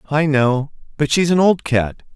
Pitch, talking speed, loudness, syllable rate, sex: 145 Hz, 195 wpm, -17 LUFS, 4.4 syllables/s, male